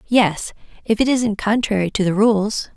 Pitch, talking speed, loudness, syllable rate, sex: 210 Hz, 175 wpm, -18 LUFS, 4.4 syllables/s, female